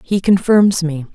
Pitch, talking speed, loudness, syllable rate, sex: 180 Hz, 155 wpm, -14 LUFS, 4.0 syllables/s, female